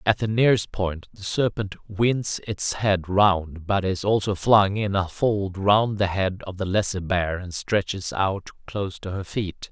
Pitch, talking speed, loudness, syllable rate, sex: 100 Hz, 190 wpm, -23 LUFS, 4.1 syllables/s, male